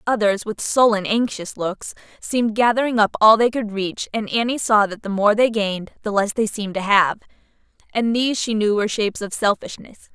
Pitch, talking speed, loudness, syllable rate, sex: 215 Hz, 200 wpm, -19 LUFS, 5.6 syllables/s, female